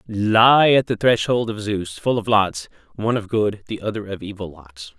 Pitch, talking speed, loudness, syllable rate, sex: 105 Hz, 205 wpm, -19 LUFS, 4.7 syllables/s, male